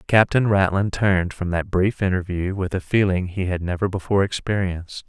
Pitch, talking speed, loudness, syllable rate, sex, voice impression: 95 Hz, 175 wpm, -21 LUFS, 5.5 syllables/s, male, very masculine, old, very thick, relaxed, very powerful, slightly bright, soft, slightly muffled, fluent, very cool, very intellectual, very sincere, very calm, very mature, friendly, reassuring, very unique, elegant, slightly wild, sweet, slightly lively, very kind, slightly modest